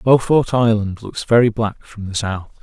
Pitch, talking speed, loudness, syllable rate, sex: 110 Hz, 185 wpm, -17 LUFS, 4.4 syllables/s, male